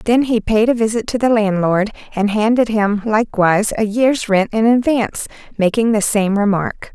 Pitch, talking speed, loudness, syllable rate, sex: 215 Hz, 180 wpm, -16 LUFS, 4.9 syllables/s, female